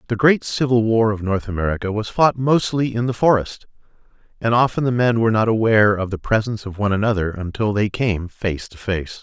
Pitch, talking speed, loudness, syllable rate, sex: 110 Hz, 210 wpm, -19 LUFS, 5.8 syllables/s, male